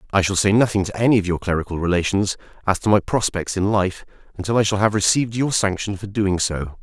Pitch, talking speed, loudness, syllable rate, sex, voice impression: 100 Hz, 230 wpm, -20 LUFS, 6.2 syllables/s, male, masculine, adult-like, tensed, powerful, hard, clear, fluent, cool, intellectual, wild, lively, slightly strict, sharp